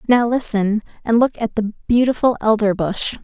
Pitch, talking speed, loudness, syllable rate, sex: 220 Hz, 150 wpm, -18 LUFS, 4.6 syllables/s, female